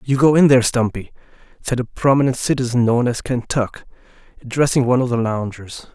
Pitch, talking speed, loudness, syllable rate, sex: 125 Hz, 170 wpm, -18 LUFS, 5.9 syllables/s, male